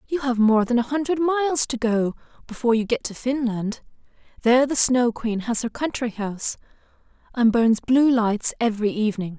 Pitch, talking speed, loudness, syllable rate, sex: 240 Hz, 180 wpm, -21 LUFS, 5.4 syllables/s, female